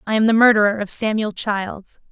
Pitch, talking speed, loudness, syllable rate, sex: 215 Hz, 200 wpm, -17 LUFS, 5.3 syllables/s, female